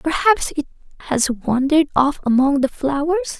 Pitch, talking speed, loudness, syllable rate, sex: 275 Hz, 140 wpm, -18 LUFS, 5.2 syllables/s, female